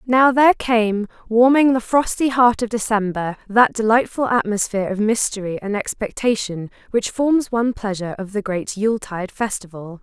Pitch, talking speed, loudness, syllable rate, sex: 220 Hz, 155 wpm, -19 LUFS, 4.9 syllables/s, female